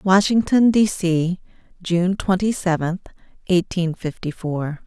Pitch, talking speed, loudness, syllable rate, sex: 180 Hz, 110 wpm, -20 LUFS, 3.9 syllables/s, female